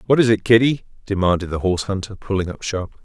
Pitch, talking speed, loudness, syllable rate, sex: 100 Hz, 215 wpm, -19 LUFS, 6.8 syllables/s, male